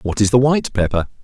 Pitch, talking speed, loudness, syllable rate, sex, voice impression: 115 Hz, 245 wpm, -16 LUFS, 6.9 syllables/s, male, very masculine, middle-aged, very thick, tensed, very powerful, bright, very soft, very clear, very fluent, very cool, very intellectual, refreshing, very sincere, very calm, very mature, very friendly, very reassuring, very unique, very elegant, slightly wild, very sweet, lively, very kind, slightly modest